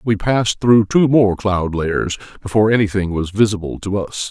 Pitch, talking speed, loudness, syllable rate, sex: 100 Hz, 180 wpm, -17 LUFS, 5.0 syllables/s, male